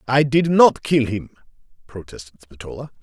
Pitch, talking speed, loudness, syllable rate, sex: 125 Hz, 140 wpm, -17 LUFS, 5.1 syllables/s, male